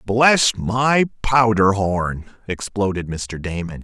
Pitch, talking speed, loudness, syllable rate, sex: 105 Hz, 110 wpm, -19 LUFS, 3.3 syllables/s, male